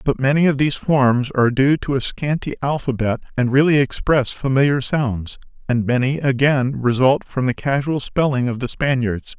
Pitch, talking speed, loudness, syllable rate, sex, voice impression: 135 Hz, 175 wpm, -18 LUFS, 4.9 syllables/s, male, very masculine, middle-aged, thick, slightly muffled, fluent, cool, slightly intellectual, slightly kind